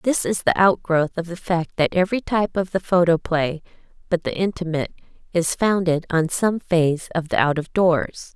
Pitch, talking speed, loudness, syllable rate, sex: 175 Hz, 185 wpm, -21 LUFS, 5.1 syllables/s, female